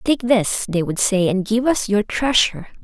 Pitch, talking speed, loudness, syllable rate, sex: 220 Hz, 210 wpm, -18 LUFS, 4.5 syllables/s, female